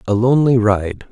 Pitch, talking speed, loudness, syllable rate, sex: 115 Hz, 160 wpm, -15 LUFS, 5.2 syllables/s, male